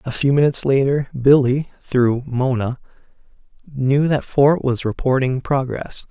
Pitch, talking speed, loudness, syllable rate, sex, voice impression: 135 Hz, 130 wpm, -18 LUFS, 4.2 syllables/s, male, very masculine, very adult-like, very middle-aged, thick, slightly relaxed, weak, slightly dark, soft, slightly muffled, fluent, cool, very intellectual, refreshing, very sincere, very calm, mature, friendly, very reassuring, slightly unique, very elegant, sweet, slightly lively, very kind, modest